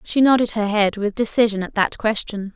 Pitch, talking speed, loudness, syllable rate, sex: 215 Hz, 210 wpm, -19 LUFS, 5.3 syllables/s, female